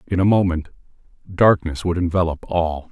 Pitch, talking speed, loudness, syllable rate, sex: 85 Hz, 145 wpm, -19 LUFS, 4.9 syllables/s, male